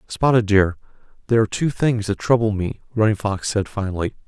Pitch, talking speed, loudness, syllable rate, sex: 105 Hz, 185 wpm, -20 LUFS, 5.9 syllables/s, male